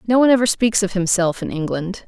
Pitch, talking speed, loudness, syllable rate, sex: 200 Hz, 230 wpm, -18 LUFS, 6.3 syllables/s, female